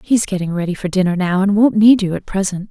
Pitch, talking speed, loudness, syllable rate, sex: 195 Hz, 265 wpm, -16 LUFS, 6.1 syllables/s, female